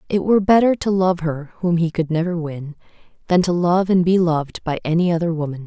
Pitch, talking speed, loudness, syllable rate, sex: 170 Hz, 225 wpm, -19 LUFS, 5.9 syllables/s, female